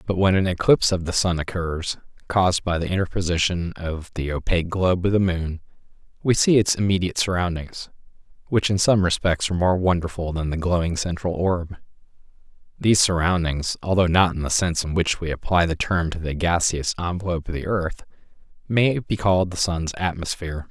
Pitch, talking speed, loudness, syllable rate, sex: 90 Hz, 180 wpm, -22 LUFS, 5.7 syllables/s, male